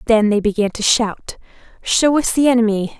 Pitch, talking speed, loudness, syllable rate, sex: 225 Hz, 160 wpm, -16 LUFS, 5.1 syllables/s, female